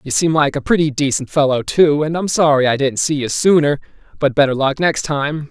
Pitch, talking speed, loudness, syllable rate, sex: 145 Hz, 230 wpm, -16 LUFS, 5.4 syllables/s, male